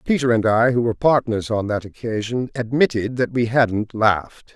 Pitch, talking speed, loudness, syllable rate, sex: 115 Hz, 185 wpm, -20 LUFS, 5.0 syllables/s, male